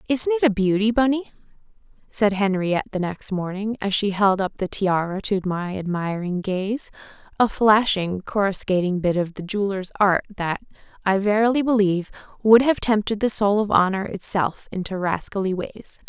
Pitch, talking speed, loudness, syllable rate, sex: 200 Hz, 160 wpm, -22 LUFS, 5.0 syllables/s, female